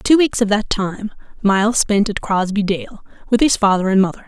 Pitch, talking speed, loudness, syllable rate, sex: 210 Hz, 210 wpm, -17 LUFS, 5.1 syllables/s, female